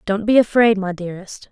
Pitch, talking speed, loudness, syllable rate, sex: 205 Hz, 200 wpm, -16 LUFS, 5.8 syllables/s, female